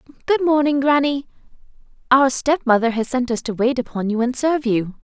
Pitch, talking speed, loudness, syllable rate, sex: 260 Hz, 190 wpm, -19 LUFS, 5.7 syllables/s, female